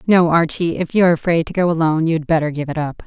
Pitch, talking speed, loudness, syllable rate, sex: 165 Hz, 255 wpm, -17 LUFS, 6.5 syllables/s, female